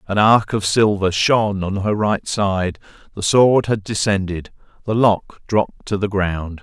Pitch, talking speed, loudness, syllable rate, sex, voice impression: 100 Hz, 170 wpm, -18 LUFS, 4.3 syllables/s, male, masculine, adult-like, tensed, powerful, clear, cool, intellectual, calm, friendly, wild, lively, slightly kind